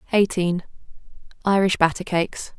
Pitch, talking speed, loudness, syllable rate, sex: 185 Hz, 70 wpm, -22 LUFS, 5.4 syllables/s, female